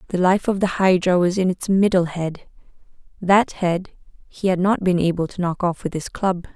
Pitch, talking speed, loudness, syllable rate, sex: 180 Hz, 210 wpm, -20 LUFS, 5.0 syllables/s, female